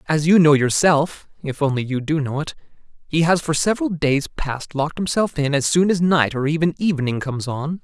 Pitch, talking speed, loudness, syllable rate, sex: 155 Hz, 215 wpm, -19 LUFS, 4.9 syllables/s, male